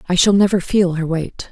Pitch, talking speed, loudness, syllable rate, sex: 180 Hz, 240 wpm, -16 LUFS, 5.3 syllables/s, female